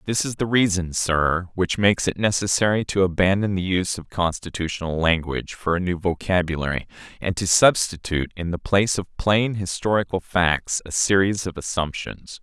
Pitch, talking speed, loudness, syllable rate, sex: 90 Hz, 165 wpm, -22 LUFS, 5.2 syllables/s, male